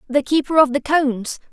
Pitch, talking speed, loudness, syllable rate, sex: 280 Hz, 195 wpm, -18 LUFS, 5.7 syllables/s, female